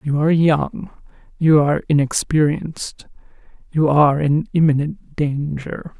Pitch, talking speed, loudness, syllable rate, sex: 150 Hz, 110 wpm, -18 LUFS, 4.5 syllables/s, female